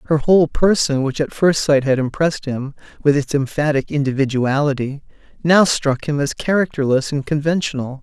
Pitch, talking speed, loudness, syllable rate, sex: 145 Hz, 155 wpm, -18 LUFS, 5.3 syllables/s, male